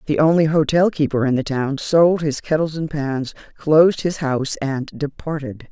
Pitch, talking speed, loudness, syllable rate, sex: 150 Hz, 180 wpm, -19 LUFS, 4.8 syllables/s, female